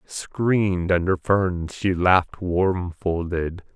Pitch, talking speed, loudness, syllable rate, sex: 90 Hz, 95 wpm, -22 LUFS, 3.1 syllables/s, male